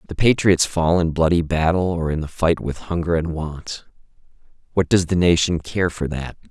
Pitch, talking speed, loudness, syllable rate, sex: 85 Hz, 195 wpm, -20 LUFS, 4.9 syllables/s, male